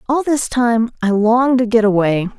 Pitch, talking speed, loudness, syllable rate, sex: 230 Hz, 200 wpm, -15 LUFS, 5.0 syllables/s, female